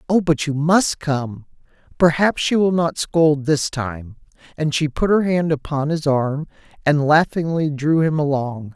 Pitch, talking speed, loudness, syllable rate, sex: 150 Hz, 170 wpm, -19 LUFS, 4.1 syllables/s, male